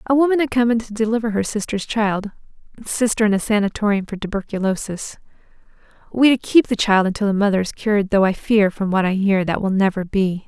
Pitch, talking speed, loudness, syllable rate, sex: 210 Hz, 200 wpm, -19 LUFS, 5.9 syllables/s, female